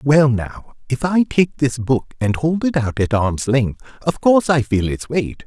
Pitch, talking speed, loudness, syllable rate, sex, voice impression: 130 Hz, 220 wpm, -18 LUFS, 4.3 syllables/s, male, masculine, adult-like, middle-aged, thick, tensed, powerful, cool, sincere, calm, mature, reassuring, wild, lively